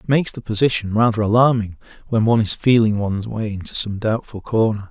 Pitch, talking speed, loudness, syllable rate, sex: 110 Hz, 195 wpm, -19 LUFS, 6.1 syllables/s, male